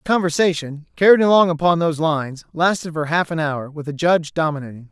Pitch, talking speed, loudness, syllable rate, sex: 160 Hz, 195 wpm, -18 LUFS, 6.2 syllables/s, male